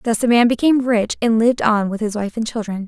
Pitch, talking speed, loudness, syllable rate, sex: 225 Hz, 270 wpm, -17 LUFS, 6.3 syllables/s, female